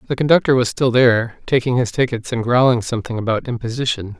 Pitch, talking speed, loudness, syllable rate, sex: 120 Hz, 185 wpm, -17 LUFS, 6.3 syllables/s, male